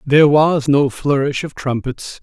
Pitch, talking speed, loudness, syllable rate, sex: 140 Hz, 160 wpm, -16 LUFS, 4.2 syllables/s, male